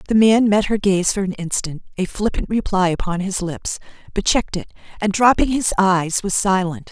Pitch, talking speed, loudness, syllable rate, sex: 195 Hz, 200 wpm, -19 LUFS, 5.1 syllables/s, female